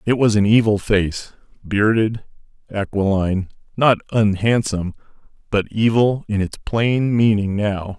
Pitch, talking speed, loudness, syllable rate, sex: 105 Hz, 120 wpm, -18 LUFS, 4.3 syllables/s, male